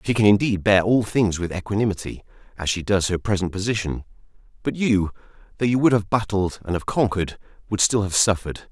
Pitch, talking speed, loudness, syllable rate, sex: 100 Hz, 185 wpm, -22 LUFS, 6.0 syllables/s, male